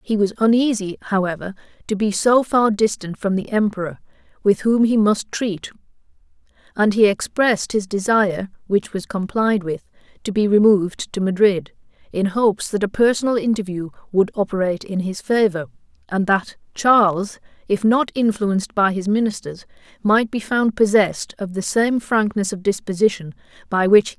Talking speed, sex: 165 wpm, female